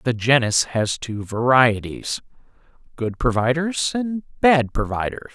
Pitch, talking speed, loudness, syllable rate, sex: 125 Hz, 110 wpm, -20 LUFS, 3.8 syllables/s, male